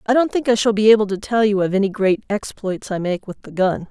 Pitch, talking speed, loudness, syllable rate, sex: 205 Hz, 290 wpm, -18 LUFS, 6.0 syllables/s, female